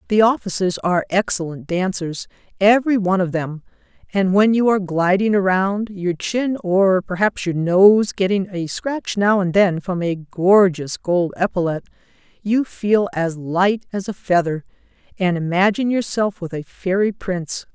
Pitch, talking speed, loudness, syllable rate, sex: 190 Hz, 150 wpm, -19 LUFS, 4.6 syllables/s, female